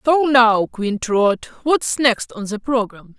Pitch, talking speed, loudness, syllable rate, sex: 235 Hz, 170 wpm, -18 LUFS, 3.5 syllables/s, female